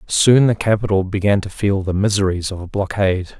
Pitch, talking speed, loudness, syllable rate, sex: 100 Hz, 195 wpm, -17 LUFS, 5.5 syllables/s, male